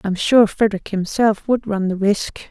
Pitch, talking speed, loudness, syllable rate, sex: 205 Hz, 190 wpm, -18 LUFS, 4.6 syllables/s, female